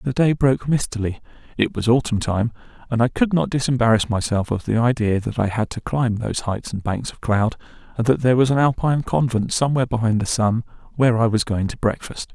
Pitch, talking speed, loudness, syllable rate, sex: 120 Hz, 220 wpm, -20 LUFS, 5.9 syllables/s, male